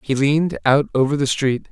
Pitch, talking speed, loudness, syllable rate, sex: 140 Hz, 210 wpm, -18 LUFS, 5.5 syllables/s, male